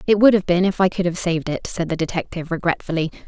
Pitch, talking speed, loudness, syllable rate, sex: 175 Hz, 255 wpm, -20 LUFS, 7.1 syllables/s, female